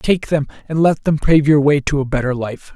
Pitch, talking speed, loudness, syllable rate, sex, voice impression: 145 Hz, 260 wpm, -16 LUFS, 5.2 syllables/s, male, masculine, very adult-like, slightly thick, sincere, slightly calm, friendly